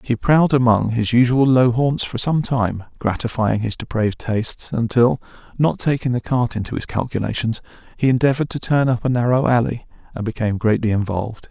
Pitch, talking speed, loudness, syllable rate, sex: 120 Hz, 175 wpm, -19 LUFS, 5.7 syllables/s, male